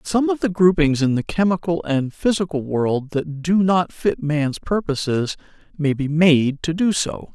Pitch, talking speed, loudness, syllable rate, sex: 160 Hz, 180 wpm, -20 LUFS, 4.3 syllables/s, male